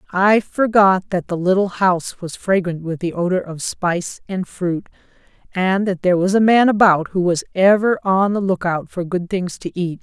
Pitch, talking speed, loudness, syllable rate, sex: 185 Hz, 200 wpm, -18 LUFS, 4.8 syllables/s, female